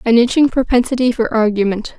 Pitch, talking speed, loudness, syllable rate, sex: 235 Hz, 150 wpm, -15 LUFS, 5.8 syllables/s, female